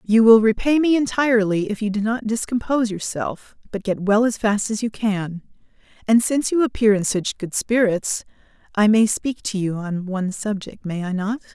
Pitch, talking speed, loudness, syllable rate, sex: 215 Hz, 195 wpm, -20 LUFS, 5.1 syllables/s, female